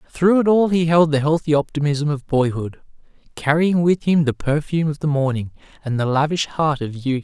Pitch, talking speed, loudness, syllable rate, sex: 150 Hz, 200 wpm, -19 LUFS, 5.3 syllables/s, male